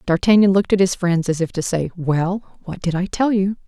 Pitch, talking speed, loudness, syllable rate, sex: 180 Hz, 245 wpm, -19 LUFS, 5.5 syllables/s, female